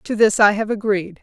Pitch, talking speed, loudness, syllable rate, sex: 205 Hz, 245 wpm, -17 LUFS, 5.0 syllables/s, female